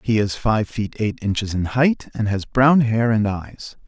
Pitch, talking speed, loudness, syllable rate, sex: 110 Hz, 215 wpm, -20 LUFS, 4.1 syllables/s, male